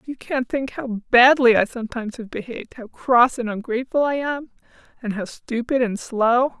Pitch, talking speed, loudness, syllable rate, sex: 245 Hz, 175 wpm, -20 LUFS, 5.0 syllables/s, female